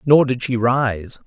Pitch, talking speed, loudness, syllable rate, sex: 125 Hz, 190 wpm, -18 LUFS, 3.7 syllables/s, male